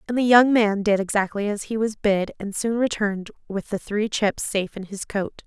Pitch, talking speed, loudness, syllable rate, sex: 210 Hz, 230 wpm, -22 LUFS, 5.2 syllables/s, female